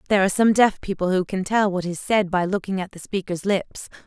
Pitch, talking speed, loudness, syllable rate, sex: 190 Hz, 250 wpm, -22 LUFS, 6.0 syllables/s, female